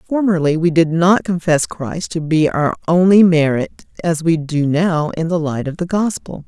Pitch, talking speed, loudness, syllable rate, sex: 165 Hz, 195 wpm, -16 LUFS, 4.5 syllables/s, female